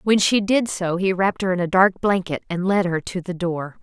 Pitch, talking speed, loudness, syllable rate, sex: 185 Hz, 265 wpm, -20 LUFS, 5.2 syllables/s, female